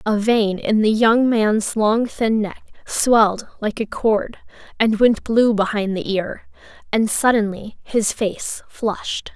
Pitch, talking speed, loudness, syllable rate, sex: 215 Hz, 155 wpm, -19 LUFS, 3.6 syllables/s, female